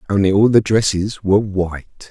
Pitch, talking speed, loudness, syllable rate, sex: 100 Hz, 170 wpm, -16 LUFS, 5.2 syllables/s, male